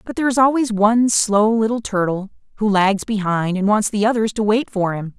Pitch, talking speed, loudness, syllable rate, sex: 210 Hz, 220 wpm, -18 LUFS, 5.4 syllables/s, female